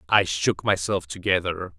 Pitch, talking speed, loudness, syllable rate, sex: 85 Hz, 135 wpm, -23 LUFS, 4.5 syllables/s, male